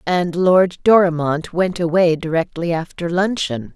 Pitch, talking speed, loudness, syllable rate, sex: 175 Hz, 130 wpm, -17 LUFS, 4.3 syllables/s, female